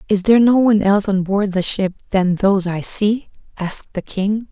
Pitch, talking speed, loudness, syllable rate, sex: 200 Hz, 215 wpm, -17 LUFS, 5.4 syllables/s, female